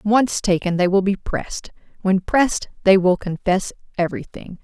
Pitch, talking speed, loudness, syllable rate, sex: 190 Hz, 155 wpm, -19 LUFS, 5.0 syllables/s, female